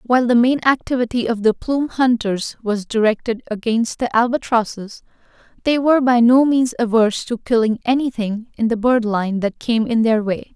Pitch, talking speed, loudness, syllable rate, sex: 235 Hz, 175 wpm, -18 LUFS, 5.1 syllables/s, female